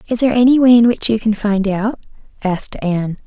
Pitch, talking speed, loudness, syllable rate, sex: 215 Hz, 220 wpm, -15 LUFS, 6.2 syllables/s, female